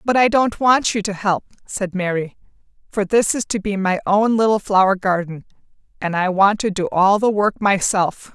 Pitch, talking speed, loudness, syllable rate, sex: 200 Hz, 210 wpm, -18 LUFS, 4.9 syllables/s, female